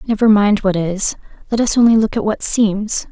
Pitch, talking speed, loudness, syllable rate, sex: 210 Hz, 195 wpm, -15 LUFS, 4.9 syllables/s, female